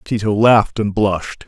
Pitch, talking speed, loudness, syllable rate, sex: 105 Hz, 165 wpm, -16 LUFS, 5.1 syllables/s, male